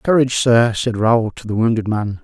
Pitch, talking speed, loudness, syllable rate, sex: 115 Hz, 215 wpm, -16 LUFS, 5.0 syllables/s, male